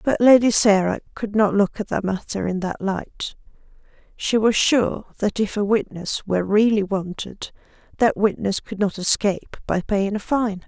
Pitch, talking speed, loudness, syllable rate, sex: 205 Hz, 175 wpm, -21 LUFS, 4.6 syllables/s, female